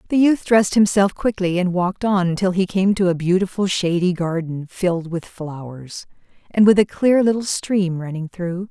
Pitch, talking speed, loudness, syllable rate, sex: 185 Hz, 185 wpm, -19 LUFS, 4.8 syllables/s, female